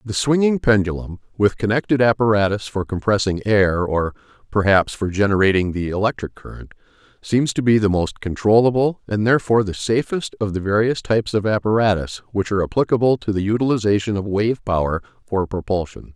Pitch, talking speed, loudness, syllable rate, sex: 105 Hz, 160 wpm, -19 LUFS, 5.7 syllables/s, male